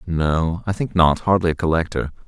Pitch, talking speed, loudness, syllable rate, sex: 85 Hz, 185 wpm, -20 LUFS, 5.0 syllables/s, male